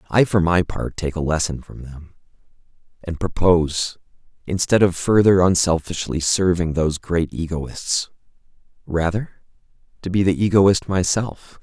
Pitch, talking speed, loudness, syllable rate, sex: 90 Hz, 130 wpm, -19 LUFS, 4.5 syllables/s, male